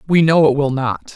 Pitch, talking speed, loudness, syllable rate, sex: 145 Hz, 260 wpm, -15 LUFS, 5.2 syllables/s, male